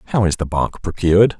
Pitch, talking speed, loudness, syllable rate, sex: 95 Hz, 215 wpm, -18 LUFS, 6.2 syllables/s, male